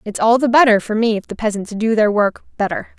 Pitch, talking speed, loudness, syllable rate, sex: 220 Hz, 260 wpm, -16 LUFS, 6.1 syllables/s, female